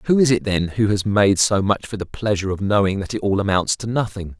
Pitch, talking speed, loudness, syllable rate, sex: 100 Hz, 275 wpm, -19 LUFS, 5.9 syllables/s, male